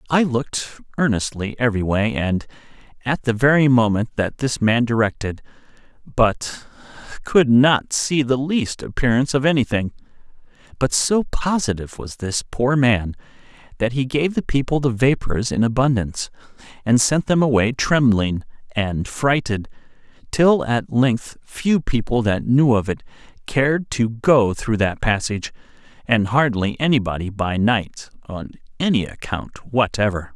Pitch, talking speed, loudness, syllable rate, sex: 120 Hz, 140 wpm, -19 LUFS, 4.5 syllables/s, male